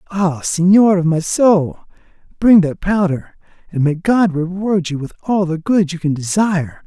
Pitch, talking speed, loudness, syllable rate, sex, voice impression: 180 Hz, 175 wpm, -16 LUFS, 4.5 syllables/s, male, masculine, adult-like, slightly bright, refreshing, friendly, slightly kind